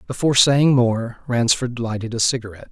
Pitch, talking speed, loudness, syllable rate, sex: 120 Hz, 155 wpm, -19 LUFS, 5.6 syllables/s, male